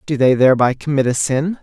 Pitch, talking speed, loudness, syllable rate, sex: 135 Hz, 220 wpm, -15 LUFS, 6.0 syllables/s, male